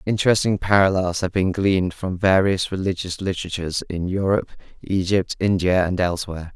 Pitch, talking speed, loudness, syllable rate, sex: 95 Hz, 135 wpm, -21 LUFS, 5.8 syllables/s, male